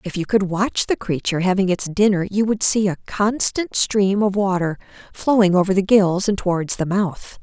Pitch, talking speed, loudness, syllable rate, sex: 195 Hz, 200 wpm, -19 LUFS, 5.0 syllables/s, female